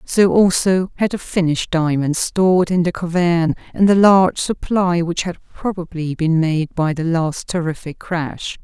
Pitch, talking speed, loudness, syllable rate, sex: 175 Hz, 165 wpm, -17 LUFS, 4.5 syllables/s, female